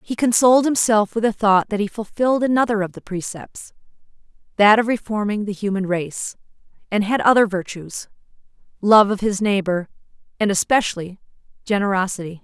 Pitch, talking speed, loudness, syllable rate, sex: 205 Hz, 130 wpm, -19 LUFS, 5.5 syllables/s, female